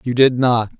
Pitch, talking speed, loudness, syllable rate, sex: 120 Hz, 230 wpm, -15 LUFS, 4.6 syllables/s, male